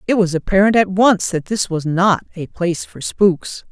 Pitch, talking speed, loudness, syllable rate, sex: 185 Hz, 210 wpm, -17 LUFS, 4.7 syllables/s, female